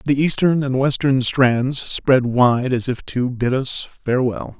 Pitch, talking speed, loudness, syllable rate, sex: 130 Hz, 170 wpm, -18 LUFS, 3.8 syllables/s, male